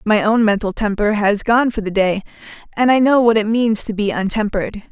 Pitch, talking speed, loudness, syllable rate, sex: 215 Hz, 220 wpm, -16 LUFS, 5.4 syllables/s, female